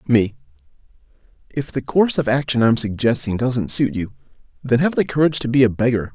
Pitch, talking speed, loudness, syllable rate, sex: 125 Hz, 185 wpm, -18 LUFS, 6.0 syllables/s, male